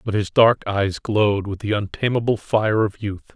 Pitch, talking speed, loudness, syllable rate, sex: 105 Hz, 195 wpm, -20 LUFS, 4.8 syllables/s, male